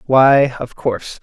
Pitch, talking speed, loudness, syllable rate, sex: 130 Hz, 145 wpm, -15 LUFS, 3.9 syllables/s, male